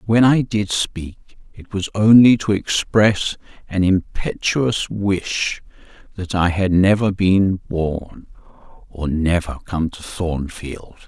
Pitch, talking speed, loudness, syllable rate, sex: 95 Hz, 125 wpm, -18 LUFS, 3.3 syllables/s, male